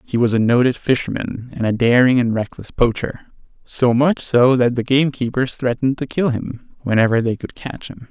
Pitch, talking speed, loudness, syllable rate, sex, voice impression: 125 Hz, 190 wpm, -18 LUFS, 5.2 syllables/s, male, very masculine, middle-aged, very thick, tensed, powerful, slightly bright, slightly soft, muffled, fluent, raspy, cool, intellectual, slightly refreshing, sincere, very calm, very mature, friendly, reassuring, unique, slightly elegant, wild, slightly sweet, lively, kind, slightly intense, slightly modest